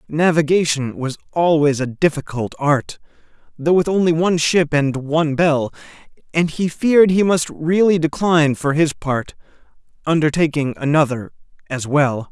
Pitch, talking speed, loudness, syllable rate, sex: 155 Hz, 135 wpm, -17 LUFS, 4.8 syllables/s, male